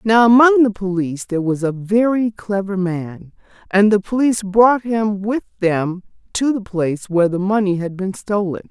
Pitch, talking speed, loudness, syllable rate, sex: 200 Hz, 180 wpm, -17 LUFS, 4.9 syllables/s, female